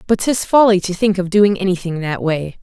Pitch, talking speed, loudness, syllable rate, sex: 190 Hz, 230 wpm, -16 LUFS, 5.3 syllables/s, female